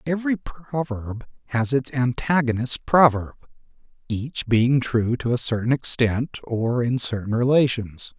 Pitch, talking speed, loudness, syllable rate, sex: 125 Hz, 125 wpm, -22 LUFS, 4.2 syllables/s, male